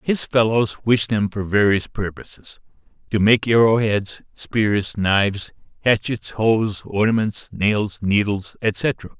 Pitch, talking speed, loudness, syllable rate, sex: 105 Hz, 125 wpm, -19 LUFS, 3.7 syllables/s, male